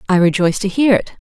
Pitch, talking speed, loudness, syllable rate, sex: 195 Hz, 235 wpm, -15 LUFS, 6.9 syllables/s, female